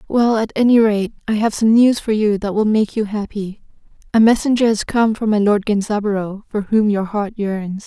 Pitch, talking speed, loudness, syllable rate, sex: 210 Hz, 215 wpm, -17 LUFS, 5.0 syllables/s, female